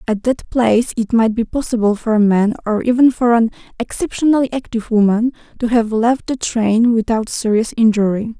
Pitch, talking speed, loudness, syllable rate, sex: 230 Hz, 180 wpm, -16 LUFS, 5.3 syllables/s, female